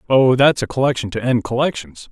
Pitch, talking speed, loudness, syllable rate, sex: 125 Hz, 200 wpm, -17 LUFS, 5.7 syllables/s, male